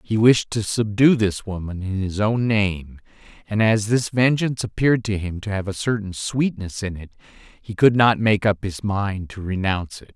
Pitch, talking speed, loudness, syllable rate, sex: 105 Hz, 200 wpm, -21 LUFS, 4.8 syllables/s, male